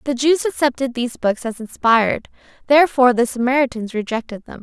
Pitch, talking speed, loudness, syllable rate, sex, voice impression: 250 Hz, 155 wpm, -18 LUFS, 6.1 syllables/s, female, feminine, slightly young, tensed, powerful, bright, clear, slightly raspy, cute, friendly, slightly reassuring, slightly sweet, lively, kind